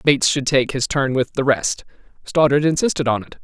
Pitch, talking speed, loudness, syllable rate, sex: 135 Hz, 190 wpm, -18 LUFS, 5.5 syllables/s, male